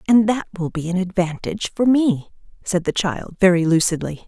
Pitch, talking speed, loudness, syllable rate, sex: 185 Hz, 180 wpm, -20 LUFS, 5.2 syllables/s, female